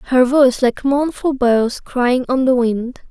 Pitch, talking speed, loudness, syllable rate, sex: 255 Hz, 175 wpm, -16 LUFS, 3.7 syllables/s, female